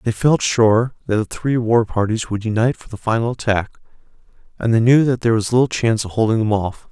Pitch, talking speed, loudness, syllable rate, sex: 115 Hz, 225 wpm, -18 LUFS, 6.0 syllables/s, male